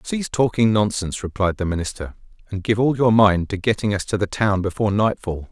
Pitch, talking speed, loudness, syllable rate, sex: 105 Hz, 205 wpm, -20 LUFS, 5.9 syllables/s, male